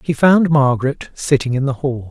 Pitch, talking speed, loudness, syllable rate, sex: 135 Hz, 200 wpm, -16 LUFS, 5.1 syllables/s, male